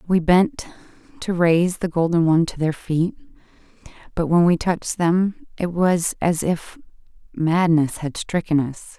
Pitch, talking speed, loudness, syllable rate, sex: 170 Hz, 155 wpm, -20 LUFS, 4.4 syllables/s, female